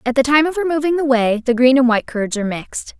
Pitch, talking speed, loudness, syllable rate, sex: 260 Hz, 280 wpm, -16 LUFS, 6.7 syllables/s, female